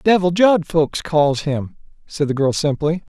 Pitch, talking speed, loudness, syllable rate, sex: 160 Hz, 170 wpm, -18 LUFS, 4.1 syllables/s, male